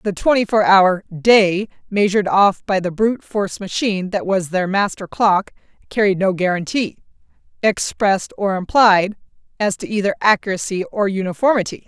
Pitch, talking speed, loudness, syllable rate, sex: 200 Hz, 140 wpm, -17 LUFS, 5.1 syllables/s, female